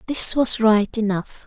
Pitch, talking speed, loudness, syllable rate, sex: 220 Hz, 165 wpm, -18 LUFS, 3.9 syllables/s, female